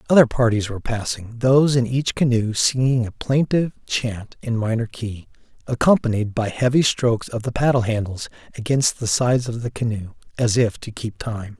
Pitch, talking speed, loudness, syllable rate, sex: 120 Hz, 175 wpm, -21 LUFS, 5.2 syllables/s, male